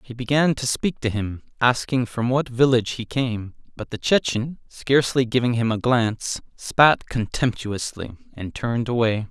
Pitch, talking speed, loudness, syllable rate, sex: 120 Hz, 160 wpm, -22 LUFS, 4.7 syllables/s, male